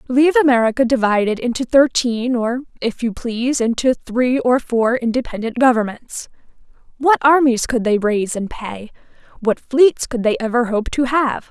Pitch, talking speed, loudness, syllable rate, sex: 245 Hz, 145 wpm, -17 LUFS, 4.9 syllables/s, female